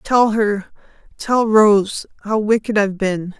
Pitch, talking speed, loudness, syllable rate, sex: 210 Hz, 105 wpm, -17 LUFS, 3.7 syllables/s, female